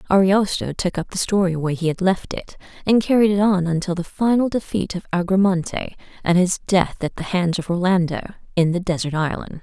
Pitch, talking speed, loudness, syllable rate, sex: 185 Hz, 200 wpm, -20 LUFS, 5.6 syllables/s, female